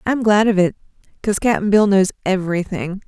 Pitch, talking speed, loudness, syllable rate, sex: 200 Hz, 175 wpm, -17 LUFS, 5.1 syllables/s, female